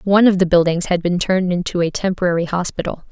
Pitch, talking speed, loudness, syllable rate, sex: 180 Hz, 210 wpm, -17 LUFS, 6.7 syllables/s, female